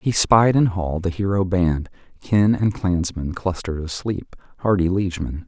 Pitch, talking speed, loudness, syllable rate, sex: 95 Hz, 155 wpm, -21 LUFS, 4.5 syllables/s, male